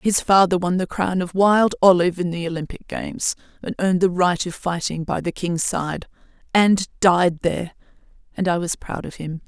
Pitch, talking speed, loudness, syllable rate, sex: 180 Hz, 195 wpm, -20 LUFS, 5.1 syllables/s, female